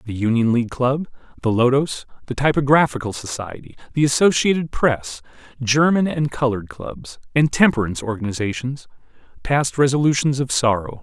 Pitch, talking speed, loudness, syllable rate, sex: 130 Hz, 125 wpm, -19 LUFS, 5.6 syllables/s, male